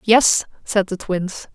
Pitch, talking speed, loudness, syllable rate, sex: 200 Hz, 155 wpm, -19 LUFS, 3.3 syllables/s, female